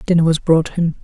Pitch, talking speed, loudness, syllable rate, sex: 165 Hz, 235 wpm, -16 LUFS, 5.8 syllables/s, female